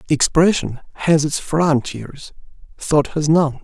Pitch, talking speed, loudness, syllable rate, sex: 150 Hz, 115 wpm, -17 LUFS, 3.6 syllables/s, male